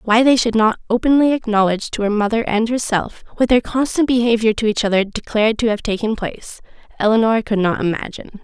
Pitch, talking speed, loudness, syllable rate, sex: 225 Hz, 190 wpm, -17 LUFS, 6.1 syllables/s, female